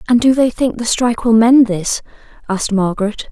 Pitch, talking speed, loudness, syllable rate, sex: 225 Hz, 200 wpm, -14 LUFS, 5.6 syllables/s, female